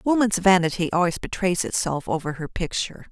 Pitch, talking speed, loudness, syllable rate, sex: 180 Hz, 155 wpm, -23 LUFS, 5.7 syllables/s, female